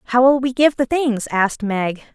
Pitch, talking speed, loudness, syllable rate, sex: 240 Hz, 225 wpm, -18 LUFS, 5.0 syllables/s, female